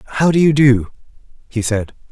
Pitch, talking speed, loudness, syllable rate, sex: 130 Hz, 170 wpm, -15 LUFS, 6.1 syllables/s, male